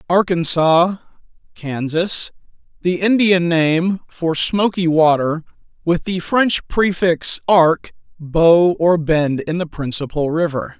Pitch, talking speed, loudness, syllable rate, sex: 170 Hz, 105 wpm, -17 LUFS, 3.5 syllables/s, male